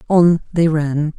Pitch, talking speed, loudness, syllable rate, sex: 160 Hz, 150 wpm, -16 LUFS, 3.4 syllables/s, female